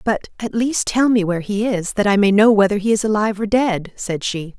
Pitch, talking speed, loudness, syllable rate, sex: 210 Hz, 260 wpm, -18 LUFS, 5.5 syllables/s, female